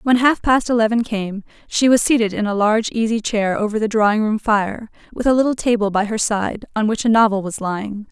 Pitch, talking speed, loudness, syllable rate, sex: 220 Hz, 230 wpm, -18 LUFS, 5.6 syllables/s, female